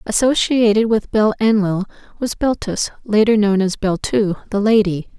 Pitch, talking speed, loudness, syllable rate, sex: 210 Hz, 125 wpm, -17 LUFS, 4.7 syllables/s, female